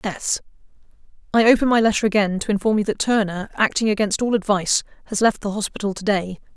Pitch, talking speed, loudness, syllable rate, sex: 205 Hz, 185 wpm, -20 LUFS, 6.4 syllables/s, female